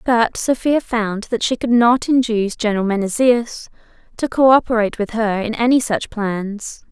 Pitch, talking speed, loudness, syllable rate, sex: 225 Hz, 155 wpm, -17 LUFS, 4.8 syllables/s, female